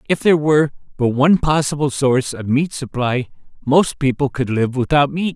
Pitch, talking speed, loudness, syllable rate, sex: 140 Hz, 180 wpm, -17 LUFS, 5.5 syllables/s, male